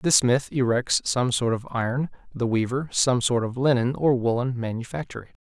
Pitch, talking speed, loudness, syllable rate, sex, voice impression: 125 Hz, 175 wpm, -24 LUFS, 5.0 syllables/s, male, very masculine, adult-like, slightly thick, cool, sincere, slightly calm, slightly elegant